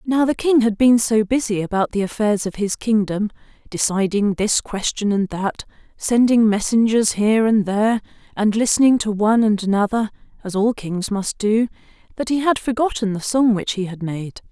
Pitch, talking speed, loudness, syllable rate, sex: 215 Hz, 180 wpm, -19 LUFS, 5.1 syllables/s, female